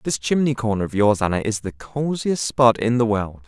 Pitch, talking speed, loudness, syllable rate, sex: 115 Hz, 225 wpm, -20 LUFS, 5.0 syllables/s, male